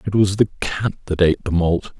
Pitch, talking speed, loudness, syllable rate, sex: 95 Hz, 240 wpm, -19 LUFS, 5.7 syllables/s, male